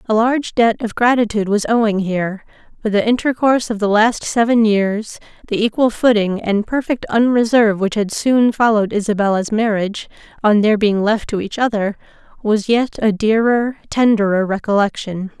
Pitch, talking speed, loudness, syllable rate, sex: 215 Hz, 160 wpm, -16 LUFS, 5.2 syllables/s, female